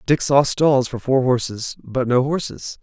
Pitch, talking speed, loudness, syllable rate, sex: 130 Hz, 190 wpm, -19 LUFS, 4.2 syllables/s, male